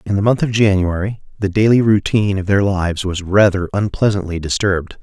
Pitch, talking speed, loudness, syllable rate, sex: 100 Hz, 180 wpm, -16 LUFS, 5.8 syllables/s, male